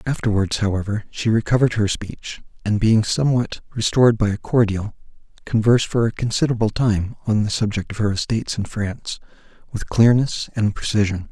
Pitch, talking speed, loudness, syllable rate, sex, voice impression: 110 Hz, 160 wpm, -20 LUFS, 5.7 syllables/s, male, masculine, adult-like, slightly muffled, calm, slightly reassuring, sweet